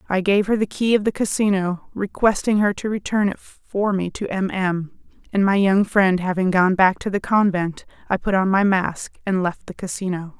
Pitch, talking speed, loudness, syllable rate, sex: 195 Hz, 215 wpm, -20 LUFS, 5.0 syllables/s, female